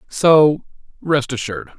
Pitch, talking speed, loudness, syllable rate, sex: 135 Hz, 100 wpm, -16 LUFS, 4.1 syllables/s, male